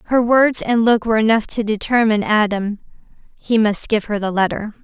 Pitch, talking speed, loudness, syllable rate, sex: 220 Hz, 185 wpm, -17 LUFS, 5.5 syllables/s, female